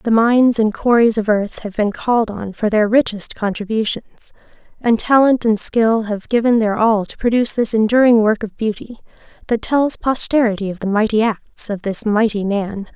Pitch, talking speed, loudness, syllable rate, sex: 220 Hz, 185 wpm, -16 LUFS, 5.0 syllables/s, female